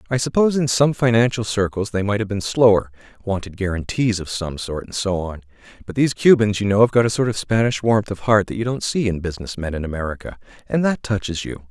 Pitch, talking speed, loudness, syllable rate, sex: 105 Hz, 235 wpm, -20 LUFS, 6.2 syllables/s, male